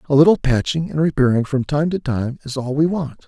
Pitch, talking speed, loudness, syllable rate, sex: 145 Hz, 240 wpm, -19 LUFS, 5.6 syllables/s, male